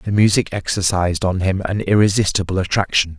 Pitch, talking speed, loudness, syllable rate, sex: 95 Hz, 150 wpm, -18 LUFS, 5.9 syllables/s, male